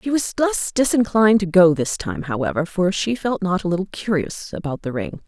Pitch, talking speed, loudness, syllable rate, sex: 190 Hz, 215 wpm, -20 LUFS, 5.3 syllables/s, female